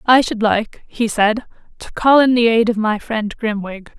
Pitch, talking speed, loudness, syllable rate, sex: 225 Hz, 210 wpm, -16 LUFS, 4.4 syllables/s, female